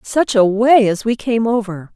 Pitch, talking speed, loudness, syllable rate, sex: 220 Hz, 215 wpm, -15 LUFS, 4.3 syllables/s, female